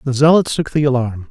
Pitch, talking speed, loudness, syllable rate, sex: 135 Hz, 230 wpm, -15 LUFS, 5.9 syllables/s, male